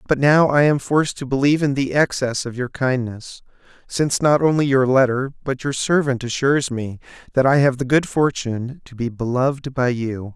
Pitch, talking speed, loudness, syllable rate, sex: 135 Hz, 195 wpm, -19 LUFS, 5.3 syllables/s, male